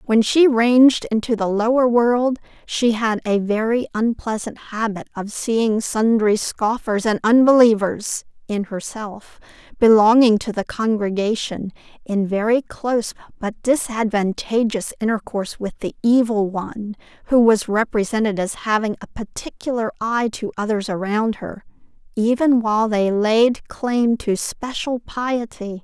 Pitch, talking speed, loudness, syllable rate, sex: 225 Hz, 130 wpm, -19 LUFS, 4.3 syllables/s, female